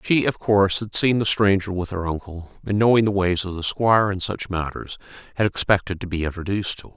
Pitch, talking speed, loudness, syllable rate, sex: 100 Hz, 235 wpm, -21 LUFS, 6.1 syllables/s, male